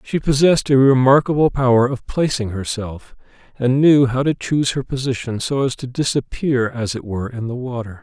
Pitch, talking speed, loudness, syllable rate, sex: 130 Hz, 185 wpm, -18 LUFS, 5.3 syllables/s, male